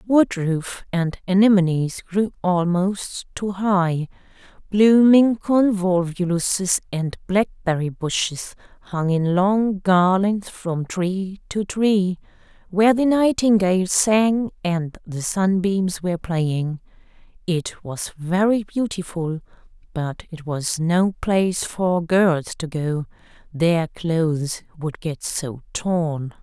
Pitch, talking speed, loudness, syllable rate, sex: 185 Hz, 110 wpm, -21 LUFS, 3.4 syllables/s, female